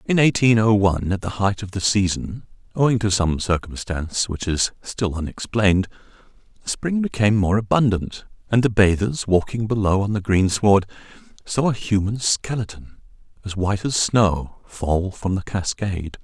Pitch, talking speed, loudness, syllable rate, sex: 100 Hz, 160 wpm, -21 LUFS, 4.9 syllables/s, male